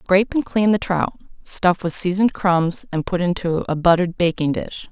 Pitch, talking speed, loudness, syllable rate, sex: 180 Hz, 195 wpm, -19 LUFS, 5.2 syllables/s, female